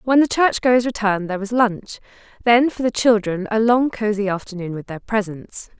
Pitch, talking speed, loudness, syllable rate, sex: 215 Hz, 185 wpm, -19 LUFS, 5.3 syllables/s, female